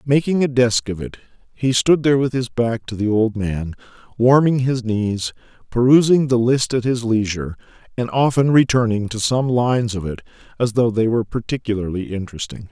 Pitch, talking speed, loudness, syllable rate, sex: 120 Hz, 180 wpm, -18 LUFS, 5.3 syllables/s, male